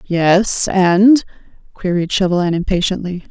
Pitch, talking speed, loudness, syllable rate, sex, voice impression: 185 Hz, 75 wpm, -15 LUFS, 4.1 syllables/s, female, feminine, very adult-like, calm, slightly reassuring, elegant, slightly sweet